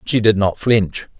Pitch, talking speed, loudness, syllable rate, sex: 105 Hz, 200 wpm, -17 LUFS, 4.0 syllables/s, male